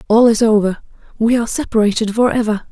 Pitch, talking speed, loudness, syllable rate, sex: 220 Hz, 155 wpm, -15 LUFS, 6.4 syllables/s, female